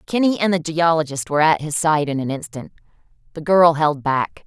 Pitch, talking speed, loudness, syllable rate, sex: 155 Hz, 200 wpm, -18 LUFS, 5.4 syllables/s, female